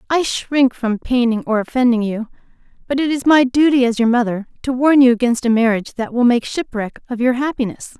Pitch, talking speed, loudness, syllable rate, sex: 245 Hz, 210 wpm, -17 LUFS, 5.6 syllables/s, female